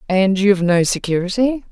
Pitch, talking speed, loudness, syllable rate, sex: 195 Hz, 140 wpm, -16 LUFS, 5.3 syllables/s, female